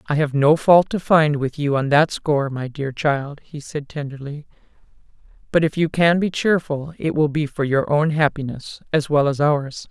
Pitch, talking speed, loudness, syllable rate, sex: 150 Hz, 205 wpm, -19 LUFS, 4.7 syllables/s, female